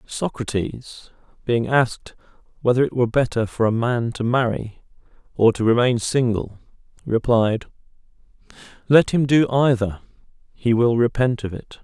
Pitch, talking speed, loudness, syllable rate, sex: 120 Hz, 125 wpm, -20 LUFS, 4.6 syllables/s, male